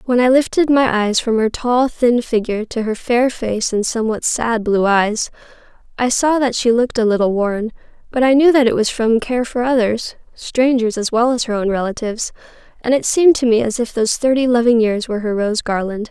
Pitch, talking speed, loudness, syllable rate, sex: 235 Hz, 220 wpm, -16 LUFS, 5.4 syllables/s, female